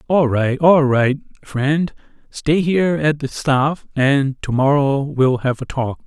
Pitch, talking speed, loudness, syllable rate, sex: 140 Hz, 160 wpm, -17 LUFS, 3.5 syllables/s, male